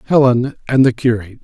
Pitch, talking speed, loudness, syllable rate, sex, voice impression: 125 Hz, 170 wpm, -15 LUFS, 6.3 syllables/s, male, very masculine, old, very thick, very relaxed, very weak, dark, very soft, muffled, slightly halting, raspy, slightly cool, slightly intellectual, slightly refreshing, sincere, very calm, very mature, slightly friendly, slightly reassuring, very unique, slightly elegant, wild, slightly sweet, kind, very modest